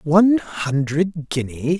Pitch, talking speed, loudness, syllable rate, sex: 160 Hz, 100 wpm, -20 LUFS, 3.4 syllables/s, male